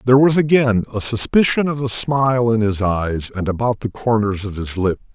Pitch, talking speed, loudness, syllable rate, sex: 115 Hz, 210 wpm, -17 LUFS, 5.3 syllables/s, male